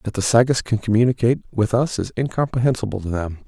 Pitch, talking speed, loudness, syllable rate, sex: 115 Hz, 190 wpm, -20 LUFS, 6.5 syllables/s, male